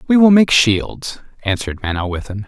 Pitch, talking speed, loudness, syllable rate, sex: 125 Hz, 145 wpm, -15 LUFS, 5.2 syllables/s, male